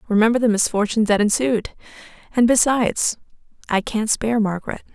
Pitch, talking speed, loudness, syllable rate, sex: 220 Hz, 135 wpm, -19 LUFS, 6.1 syllables/s, female